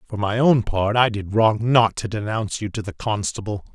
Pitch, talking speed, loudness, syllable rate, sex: 110 Hz, 225 wpm, -21 LUFS, 5.2 syllables/s, male